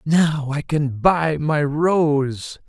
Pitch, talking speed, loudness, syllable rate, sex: 150 Hz, 135 wpm, -19 LUFS, 2.4 syllables/s, male